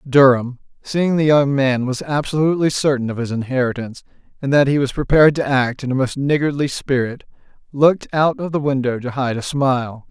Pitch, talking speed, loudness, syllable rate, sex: 135 Hz, 190 wpm, -18 LUFS, 5.6 syllables/s, male